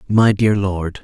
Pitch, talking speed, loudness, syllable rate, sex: 100 Hz, 175 wpm, -16 LUFS, 3.5 syllables/s, male